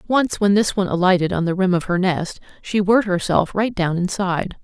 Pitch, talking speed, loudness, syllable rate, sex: 190 Hz, 220 wpm, -19 LUFS, 5.7 syllables/s, female